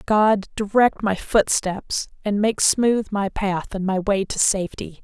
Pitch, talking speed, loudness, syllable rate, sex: 200 Hz, 165 wpm, -21 LUFS, 3.9 syllables/s, female